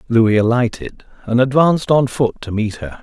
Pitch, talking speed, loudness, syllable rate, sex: 120 Hz, 180 wpm, -16 LUFS, 5.4 syllables/s, male